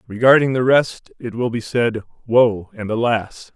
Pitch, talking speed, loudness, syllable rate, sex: 120 Hz, 170 wpm, -18 LUFS, 4.3 syllables/s, male